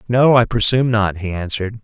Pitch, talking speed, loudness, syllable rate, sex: 110 Hz, 195 wpm, -16 LUFS, 6.0 syllables/s, male